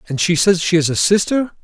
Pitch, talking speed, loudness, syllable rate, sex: 180 Hz, 255 wpm, -15 LUFS, 5.8 syllables/s, male